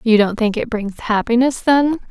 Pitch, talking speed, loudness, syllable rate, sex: 235 Hz, 200 wpm, -17 LUFS, 4.7 syllables/s, female